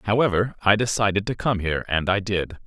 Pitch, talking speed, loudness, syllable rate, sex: 100 Hz, 200 wpm, -22 LUFS, 5.9 syllables/s, male